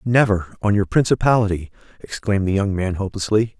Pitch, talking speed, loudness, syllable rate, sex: 100 Hz, 150 wpm, -19 LUFS, 6.1 syllables/s, male